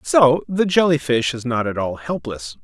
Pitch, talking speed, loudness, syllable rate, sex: 130 Hz, 205 wpm, -19 LUFS, 4.4 syllables/s, male